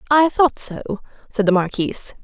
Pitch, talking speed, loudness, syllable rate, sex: 230 Hz, 160 wpm, -19 LUFS, 4.7 syllables/s, female